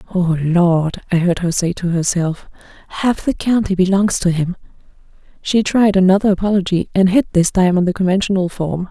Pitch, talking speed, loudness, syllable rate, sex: 185 Hz, 175 wpm, -16 LUFS, 5.2 syllables/s, female